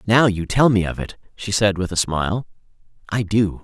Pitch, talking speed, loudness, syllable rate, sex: 100 Hz, 215 wpm, -20 LUFS, 5.2 syllables/s, male